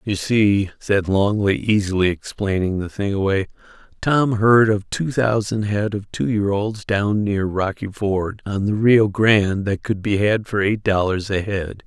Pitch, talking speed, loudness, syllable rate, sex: 100 Hz, 180 wpm, -19 LUFS, 4.1 syllables/s, male